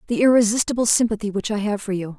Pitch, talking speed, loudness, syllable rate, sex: 215 Hz, 220 wpm, -20 LUFS, 7.0 syllables/s, female